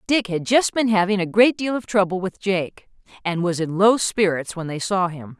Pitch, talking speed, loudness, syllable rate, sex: 195 Hz, 235 wpm, -20 LUFS, 4.9 syllables/s, female